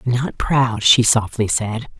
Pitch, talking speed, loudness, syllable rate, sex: 115 Hz, 150 wpm, -17 LUFS, 3.3 syllables/s, female